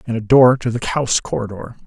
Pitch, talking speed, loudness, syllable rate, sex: 120 Hz, 225 wpm, -16 LUFS, 6.0 syllables/s, male